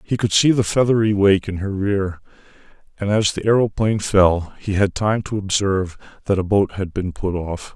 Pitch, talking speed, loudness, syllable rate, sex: 100 Hz, 200 wpm, -19 LUFS, 5.0 syllables/s, male